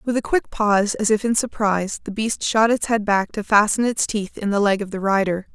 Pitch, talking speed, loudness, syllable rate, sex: 210 Hz, 260 wpm, -20 LUFS, 5.5 syllables/s, female